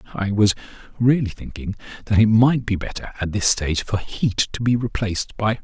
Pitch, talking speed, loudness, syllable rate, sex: 105 Hz, 190 wpm, -21 LUFS, 5.4 syllables/s, male